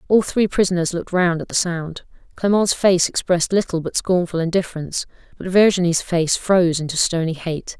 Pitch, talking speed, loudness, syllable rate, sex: 175 Hz, 170 wpm, -19 LUFS, 5.6 syllables/s, female